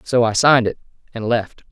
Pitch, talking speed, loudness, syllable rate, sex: 115 Hz, 210 wpm, -17 LUFS, 5.9 syllables/s, male